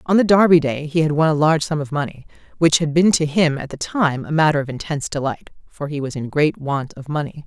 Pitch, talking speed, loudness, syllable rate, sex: 150 Hz, 255 wpm, -19 LUFS, 6.1 syllables/s, female